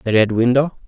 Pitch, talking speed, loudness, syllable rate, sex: 125 Hz, 205 wpm, -16 LUFS, 5.8 syllables/s, male